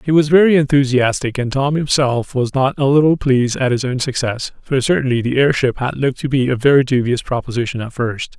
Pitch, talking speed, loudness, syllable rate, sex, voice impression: 130 Hz, 215 wpm, -16 LUFS, 5.7 syllables/s, male, very masculine, slightly old, thick, tensed, very powerful, bright, slightly soft, slightly muffled, fluent, slightly raspy, cool, intellectual, refreshing, sincere, slightly calm, mature, friendly, reassuring, unique, slightly elegant, wild, slightly sweet, lively, kind, slightly modest